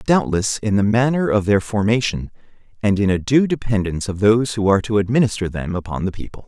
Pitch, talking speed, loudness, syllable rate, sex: 105 Hz, 205 wpm, -19 LUFS, 6.2 syllables/s, male